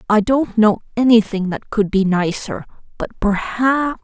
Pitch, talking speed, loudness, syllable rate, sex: 220 Hz, 150 wpm, -17 LUFS, 4.3 syllables/s, female